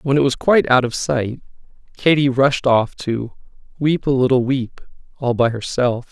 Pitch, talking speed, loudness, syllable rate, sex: 130 Hz, 175 wpm, -18 LUFS, 4.7 syllables/s, male